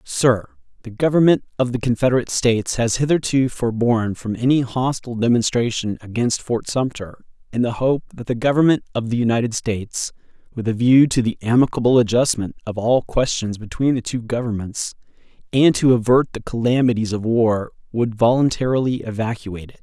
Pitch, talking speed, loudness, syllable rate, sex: 120 Hz, 155 wpm, -19 LUFS, 5.5 syllables/s, male